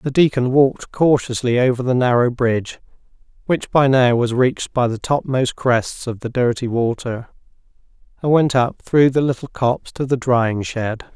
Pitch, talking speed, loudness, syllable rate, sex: 125 Hz, 170 wpm, -18 LUFS, 4.8 syllables/s, male